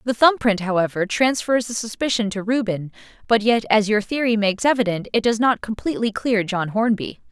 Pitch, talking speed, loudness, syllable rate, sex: 220 Hz, 190 wpm, -20 LUFS, 5.6 syllables/s, female